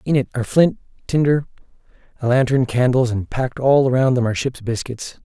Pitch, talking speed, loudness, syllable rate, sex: 130 Hz, 180 wpm, -19 LUFS, 6.0 syllables/s, male